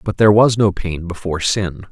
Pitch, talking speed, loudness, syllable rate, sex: 95 Hz, 220 wpm, -16 LUFS, 5.8 syllables/s, male